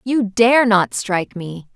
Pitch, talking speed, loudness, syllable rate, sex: 210 Hz, 170 wpm, -16 LUFS, 3.9 syllables/s, female